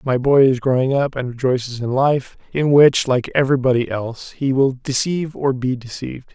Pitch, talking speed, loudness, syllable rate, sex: 130 Hz, 190 wpm, -18 LUFS, 5.3 syllables/s, male